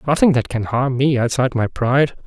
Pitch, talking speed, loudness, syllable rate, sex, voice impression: 130 Hz, 210 wpm, -18 LUFS, 5.9 syllables/s, male, masculine, adult-like, slightly middle-aged, slightly thick, slightly relaxed, slightly weak, slightly bright, slightly soft, slightly muffled, slightly halting, slightly raspy, slightly cool, intellectual, sincere, slightly calm, slightly mature, slightly friendly, slightly reassuring, wild, slightly lively, kind, modest